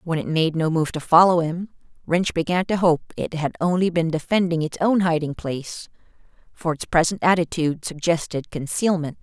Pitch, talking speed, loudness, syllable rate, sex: 165 Hz, 175 wpm, -21 LUFS, 5.2 syllables/s, female